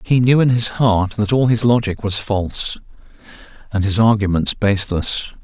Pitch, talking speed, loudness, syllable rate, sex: 105 Hz, 165 wpm, -17 LUFS, 4.9 syllables/s, male